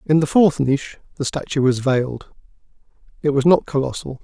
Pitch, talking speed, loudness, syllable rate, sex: 140 Hz, 170 wpm, -19 LUFS, 5.6 syllables/s, male